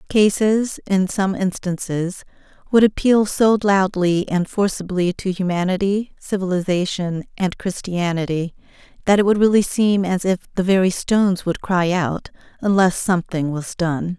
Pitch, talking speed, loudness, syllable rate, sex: 185 Hz, 135 wpm, -19 LUFS, 4.5 syllables/s, female